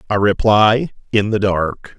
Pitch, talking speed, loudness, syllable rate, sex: 105 Hz, 150 wpm, -16 LUFS, 3.9 syllables/s, male